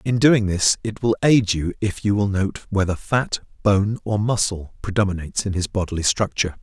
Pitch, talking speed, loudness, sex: 100 Hz, 190 wpm, -21 LUFS, male